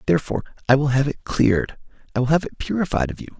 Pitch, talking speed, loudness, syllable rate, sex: 135 Hz, 230 wpm, -21 LUFS, 7.3 syllables/s, male